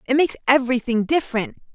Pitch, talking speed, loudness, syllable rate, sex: 255 Hz, 135 wpm, -20 LUFS, 7.5 syllables/s, female